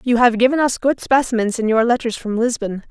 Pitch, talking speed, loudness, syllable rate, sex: 240 Hz, 230 wpm, -17 LUFS, 5.7 syllables/s, female